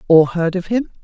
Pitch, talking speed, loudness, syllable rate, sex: 180 Hz, 230 wpm, -17 LUFS, 5.2 syllables/s, female